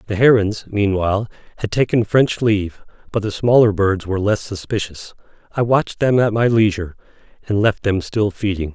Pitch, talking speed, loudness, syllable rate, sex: 105 Hz, 170 wpm, -18 LUFS, 5.4 syllables/s, male